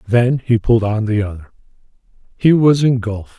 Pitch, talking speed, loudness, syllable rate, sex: 115 Hz, 160 wpm, -15 LUFS, 5.5 syllables/s, male